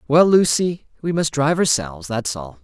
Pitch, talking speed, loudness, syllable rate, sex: 135 Hz, 180 wpm, -19 LUFS, 5.2 syllables/s, male